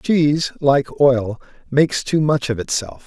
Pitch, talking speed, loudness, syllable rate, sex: 140 Hz, 155 wpm, -18 LUFS, 4.1 syllables/s, male